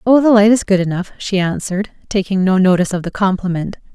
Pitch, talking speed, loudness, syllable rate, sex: 195 Hz, 215 wpm, -15 LUFS, 6.2 syllables/s, female